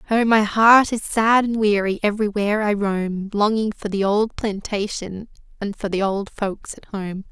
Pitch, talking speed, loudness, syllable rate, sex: 205 Hz, 180 wpm, -20 LUFS, 4.6 syllables/s, female